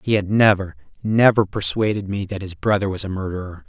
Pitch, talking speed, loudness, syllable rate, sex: 100 Hz, 195 wpm, -20 LUFS, 5.7 syllables/s, male